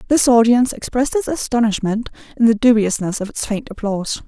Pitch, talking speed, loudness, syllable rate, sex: 230 Hz, 170 wpm, -17 LUFS, 6.1 syllables/s, female